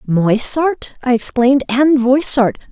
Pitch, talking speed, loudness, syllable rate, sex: 255 Hz, 110 wpm, -14 LUFS, 3.8 syllables/s, female